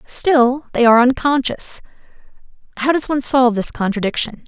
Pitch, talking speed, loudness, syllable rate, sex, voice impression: 255 Hz, 135 wpm, -16 LUFS, 5.5 syllables/s, female, very feminine, slightly young, slightly adult-like, very thin, very tensed, powerful, very bright, hard, very clear, very fluent, cute, intellectual, slightly refreshing, slightly sincere, friendly, slightly reassuring, unique, slightly wild, very lively, intense, slightly sharp, light